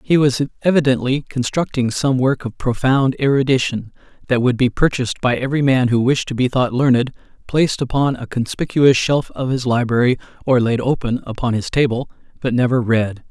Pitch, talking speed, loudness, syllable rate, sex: 130 Hz, 170 wpm, -18 LUFS, 5.4 syllables/s, male